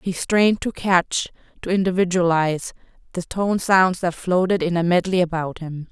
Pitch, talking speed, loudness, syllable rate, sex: 180 Hz, 160 wpm, -20 LUFS, 4.9 syllables/s, female